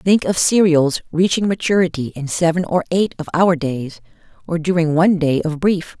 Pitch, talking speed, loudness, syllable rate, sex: 170 Hz, 180 wpm, -17 LUFS, 4.9 syllables/s, female